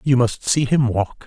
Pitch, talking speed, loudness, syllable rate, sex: 125 Hz, 240 wpm, -19 LUFS, 4.3 syllables/s, male